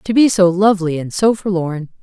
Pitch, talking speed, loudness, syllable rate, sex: 190 Hz, 205 wpm, -15 LUFS, 5.5 syllables/s, female